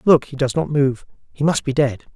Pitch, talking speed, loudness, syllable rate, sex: 140 Hz, 225 wpm, -19 LUFS, 5.3 syllables/s, male